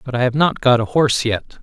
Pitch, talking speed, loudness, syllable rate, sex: 125 Hz, 295 wpm, -17 LUFS, 5.9 syllables/s, male